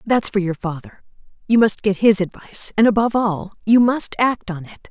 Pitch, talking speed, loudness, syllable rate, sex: 210 Hz, 210 wpm, -18 LUFS, 5.4 syllables/s, female